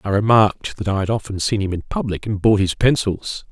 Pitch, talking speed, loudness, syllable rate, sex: 105 Hz, 240 wpm, -19 LUFS, 5.6 syllables/s, male